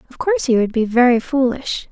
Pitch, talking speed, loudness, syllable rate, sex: 245 Hz, 220 wpm, -17 LUFS, 5.9 syllables/s, female